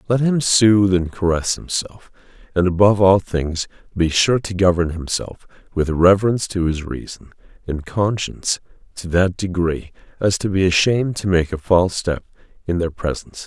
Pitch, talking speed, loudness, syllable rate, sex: 95 Hz, 165 wpm, -19 LUFS, 5.2 syllables/s, male